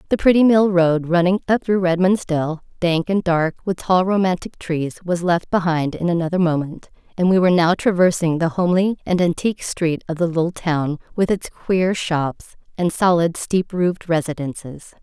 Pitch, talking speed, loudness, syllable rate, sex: 175 Hz, 180 wpm, -19 LUFS, 5.0 syllables/s, female